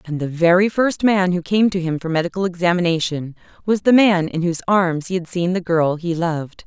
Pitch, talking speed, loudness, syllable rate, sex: 175 Hz, 225 wpm, -18 LUFS, 5.5 syllables/s, female